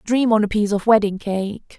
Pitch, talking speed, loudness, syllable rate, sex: 210 Hz, 235 wpm, -19 LUFS, 5.3 syllables/s, female